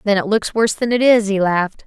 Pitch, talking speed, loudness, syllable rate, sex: 210 Hz, 290 wpm, -16 LUFS, 6.3 syllables/s, female